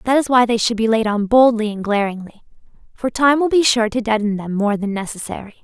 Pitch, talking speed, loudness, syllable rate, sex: 225 Hz, 235 wpm, -17 LUFS, 5.8 syllables/s, female